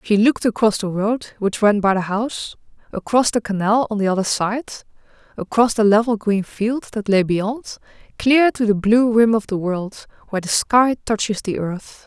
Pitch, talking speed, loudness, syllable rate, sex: 215 Hz, 195 wpm, -18 LUFS, 4.8 syllables/s, female